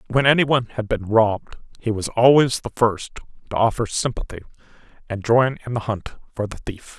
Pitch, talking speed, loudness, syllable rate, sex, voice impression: 115 Hz, 190 wpm, -20 LUFS, 5.6 syllables/s, male, very masculine, old, very thick, tensed, very powerful, slightly bright, slightly soft, muffled, slightly fluent, raspy, cool, intellectual, slightly refreshing, sincere, calm, very mature, friendly, reassuring, very unique, slightly elegant, wild, sweet, lively, kind, modest